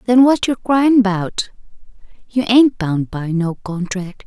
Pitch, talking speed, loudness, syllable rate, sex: 215 Hz, 155 wpm, -16 LUFS, 3.8 syllables/s, female